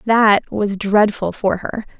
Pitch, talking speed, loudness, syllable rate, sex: 205 Hz, 150 wpm, -17 LUFS, 3.4 syllables/s, female